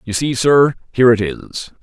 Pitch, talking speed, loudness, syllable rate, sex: 125 Hz, 200 wpm, -15 LUFS, 4.6 syllables/s, male